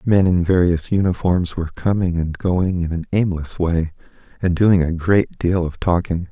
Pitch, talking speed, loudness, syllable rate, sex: 90 Hz, 180 wpm, -19 LUFS, 4.6 syllables/s, male